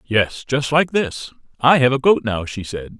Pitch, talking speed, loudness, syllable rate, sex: 125 Hz, 220 wpm, -18 LUFS, 4.2 syllables/s, male